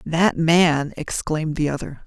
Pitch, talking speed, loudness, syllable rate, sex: 160 Hz, 145 wpm, -20 LUFS, 4.2 syllables/s, female